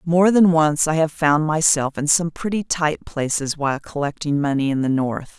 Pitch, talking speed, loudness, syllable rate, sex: 155 Hz, 200 wpm, -19 LUFS, 4.7 syllables/s, female